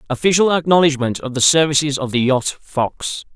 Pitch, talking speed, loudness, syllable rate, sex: 145 Hz, 160 wpm, -16 LUFS, 5.2 syllables/s, male